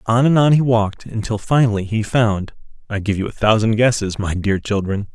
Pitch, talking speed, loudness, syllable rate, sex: 110 Hz, 200 wpm, -18 LUFS, 5.2 syllables/s, male